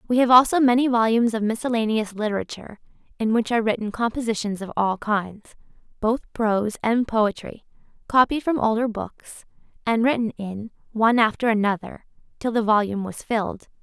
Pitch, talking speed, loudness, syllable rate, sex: 225 Hz, 150 wpm, -22 LUFS, 5.7 syllables/s, female